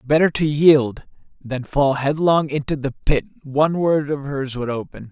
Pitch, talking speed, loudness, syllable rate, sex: 145 Hz, 175 wpm, -19 LUFS, 4.6 syllables/s, male